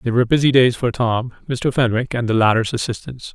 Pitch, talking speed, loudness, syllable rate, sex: 120 Hz, 215 wpm, -18 LUFS, 5.8 syllables/s, male